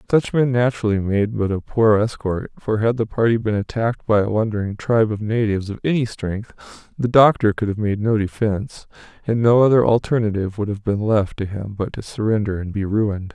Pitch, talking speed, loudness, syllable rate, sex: 110 Hz, 205 wpm, -20 LUFS, 5.6 syllables/s, male